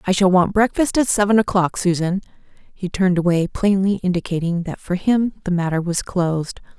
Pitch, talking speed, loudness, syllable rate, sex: 185 Hz, 175 wpm, -19 LUFS, 5.3 syllables/s, female